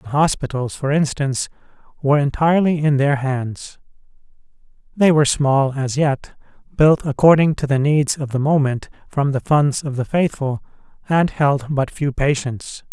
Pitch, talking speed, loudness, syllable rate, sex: 140 Hz, 155 wpm, -18 LUFS, 4.7 syllables/s, male